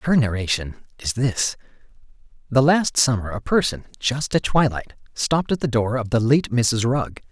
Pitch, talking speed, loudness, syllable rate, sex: 125 Hz, 170 wpm, -21 LUFS, 4.6 syllables/s, male